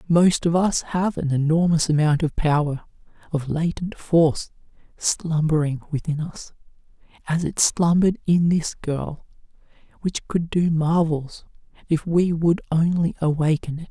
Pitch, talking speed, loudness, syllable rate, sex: 160 Hz, 135 wpm, -22 LUFS, 4.4 syllables/s, male